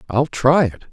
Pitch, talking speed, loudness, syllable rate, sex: 130 Hz, 195 wpm, -17 LUFS, 4.4 syllables/s, male